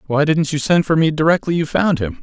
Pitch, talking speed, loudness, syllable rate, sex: 155 Hz, 270 wpm, -16 LUFS, 5.8 syllables/s, male